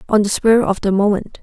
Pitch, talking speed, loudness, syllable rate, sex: 205 Hz, 250 wpm, -16 LUFS, 5.5 syllables/s, female